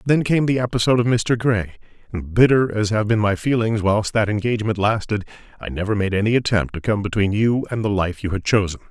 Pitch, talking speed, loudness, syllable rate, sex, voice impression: 110 Hz, 220 wpm, -20 LUFS, 6.0 syllables/s, male, masculine, very adult-like, very middle-aged, very thick, slightly tensed, powerful, slightly bright, slightly soft, slightly muffled, fluent, slightly raspy, very cool, very intellectual, sincere, calm, very mature, friendly, reassuring, very unique, slightly elegant, very wild, sweet, slightly lively, kind, slightly intense